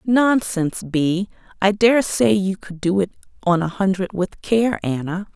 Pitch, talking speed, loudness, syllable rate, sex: 195 Hz, 170 wpm, -20 LUFS, 4.2 syllables/s, female